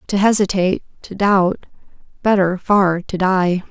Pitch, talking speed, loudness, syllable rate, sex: 190 Hz, 115 wpm, -17 LUFS, 4.3 syllables/s, female